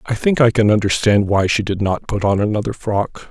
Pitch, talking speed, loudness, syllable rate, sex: 110 Hz, 235 wpm, -17 LUFS, 5.3 syllables/s, male